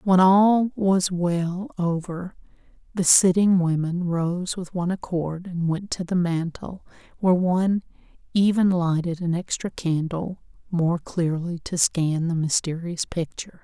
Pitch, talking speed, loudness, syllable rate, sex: 175 Hz, 135 wpm, -23 LUFS, 4.1 syllables/s, female